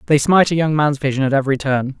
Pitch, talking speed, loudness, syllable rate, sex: 145 Hz, 270 wpm, -16 LUFS, 7.2 syllables/s, male